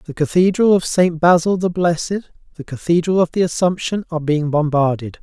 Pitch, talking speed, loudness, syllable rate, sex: 165 Hz, 170 wpm, -17 LUFS, 5.7 syllables/s, male